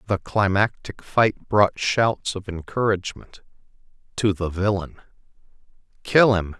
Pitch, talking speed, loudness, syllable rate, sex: 100 Hz, 100 wpm, -22 LUFS, 4.1 syllables/s, male